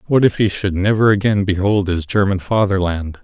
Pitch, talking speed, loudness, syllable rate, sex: 100 Hz, 185 wpm, -16 LUFS, 5.3 syllables/s, male